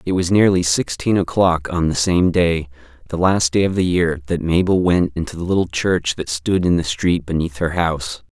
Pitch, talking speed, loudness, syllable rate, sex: 85 Hz, 215 wpm, -18 LUFS, 5.0 syllables/s, male